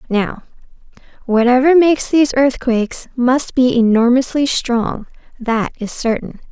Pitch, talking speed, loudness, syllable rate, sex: 250 Hz, 110 wpm, -15 LUFS, 4.5 syllables/s, female